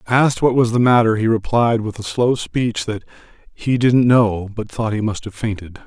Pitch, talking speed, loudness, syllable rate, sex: 115 Hz, 215 wpm, -17 LUFS, 5.0 syllables/s, male